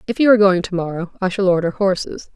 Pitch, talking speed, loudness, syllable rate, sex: 190 Hz, 255 wpm, -17 LUFS, 6.8 syllables/s, female